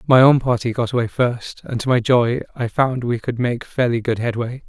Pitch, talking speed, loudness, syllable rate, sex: 120 Hz, 230 wpm, -19 LUFS, 5.1 syllables/s, male